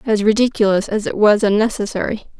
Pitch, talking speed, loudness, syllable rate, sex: 215 Hz, 150 wpm, -16 LUFS, 6.1 syllables/s, female